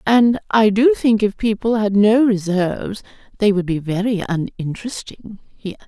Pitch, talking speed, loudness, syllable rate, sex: 210 Hz, 165 wpm, -17 LUFS, 4.8 syllables/s, female